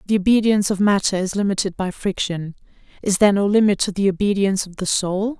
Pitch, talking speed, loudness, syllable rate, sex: 195 Hz, 200 wpm, -19 LUFS, 6.2 syllables/s, female